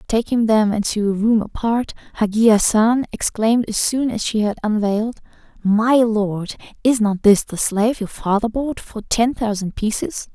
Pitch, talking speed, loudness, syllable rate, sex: 220 Hz, 170 wpm, -18 LUFS, 4.6 syllables/s, female